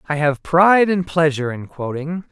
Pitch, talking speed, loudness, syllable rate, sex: 155 Hz, 180 wpm, -18 LUFS, 5.2 syllables/s, male